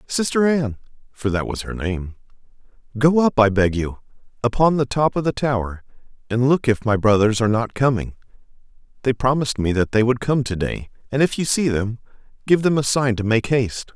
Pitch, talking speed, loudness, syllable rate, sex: 120 Hz, 200 wpm, -20 LUFS, 5.4 syllables/s, male